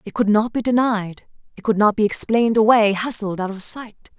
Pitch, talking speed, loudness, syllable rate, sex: 215 Hz, 215 wpm, -19 LUFS, 5.3 syllables/s, female